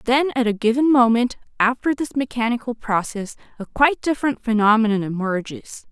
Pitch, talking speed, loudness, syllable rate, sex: 240 Hz, 140 wpm, -20 LUFS, 5.4 syllables/s, female